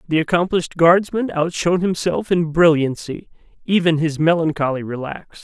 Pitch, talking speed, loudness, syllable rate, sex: 165 Hz, 120 wpm, -18 LUFS, 5.3 syllables/s, male